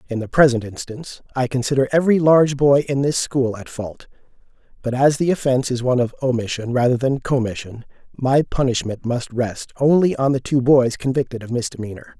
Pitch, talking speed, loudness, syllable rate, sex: 130 Hz, 180 wpm, -19 LUFS, 5.8 syllables/s, male